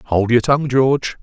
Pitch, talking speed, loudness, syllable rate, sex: 125 Hz, 195 wpm, -16 LUFS, 5.3 syllables/s, male